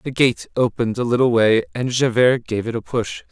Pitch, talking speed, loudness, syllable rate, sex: 120 Hz, 220 wpm, -19 LUFS, 5.3 syllables/s, male